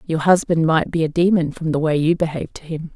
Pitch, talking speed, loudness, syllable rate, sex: 160 Hz, 265 wpm, -19 LUFS, 6.0 syllables/s, female